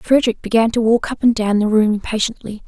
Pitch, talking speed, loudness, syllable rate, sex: 225 Hz, 225 wpm, -17 LUFS, 6.1 syllables/s, female